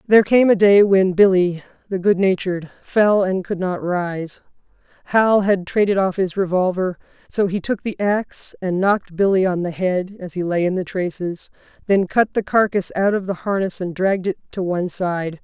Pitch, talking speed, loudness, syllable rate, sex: 190 Hz, 195 wpm, -19 LUFS, 5.0 syllables/s, female